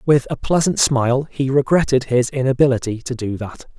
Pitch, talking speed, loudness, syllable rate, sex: 130 Hz, 175 wpm, -18 LUFS, 5.4 syllables/s, male